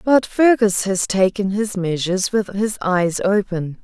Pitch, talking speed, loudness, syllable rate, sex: 200 Hz, 155 wpm, -18 LUFS, 4.1 syllables/s, female